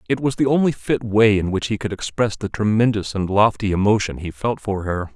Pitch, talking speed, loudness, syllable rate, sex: 105 Hz, 235 wpm, -20 LUFS, 5.4 syllables/s, male